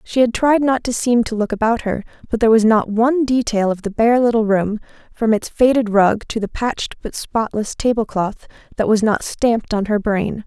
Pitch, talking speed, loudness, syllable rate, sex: 225 Hz, 220 wpm, -17 LUFS, 5.2 syllables/s, female